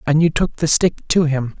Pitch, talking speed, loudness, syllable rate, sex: 155 Hz, 265 wpm, -17 LUFS, 4.8 syllables/s, male